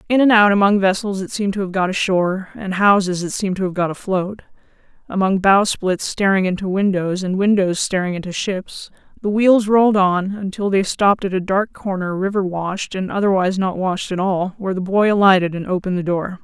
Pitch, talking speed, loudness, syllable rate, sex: 190 Hz, 200 wpm, -18 LUFS, 5.6 syllables/s, female